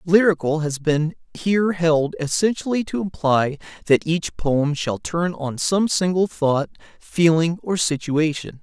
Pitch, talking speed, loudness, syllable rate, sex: 165 Hz, 140 wpm, -21 LUFS, 4.1 syllables/s, male